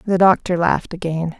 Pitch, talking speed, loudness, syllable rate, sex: 180 Hz, 170 wpm, -18 LUFS, 5.6 syllables/s, female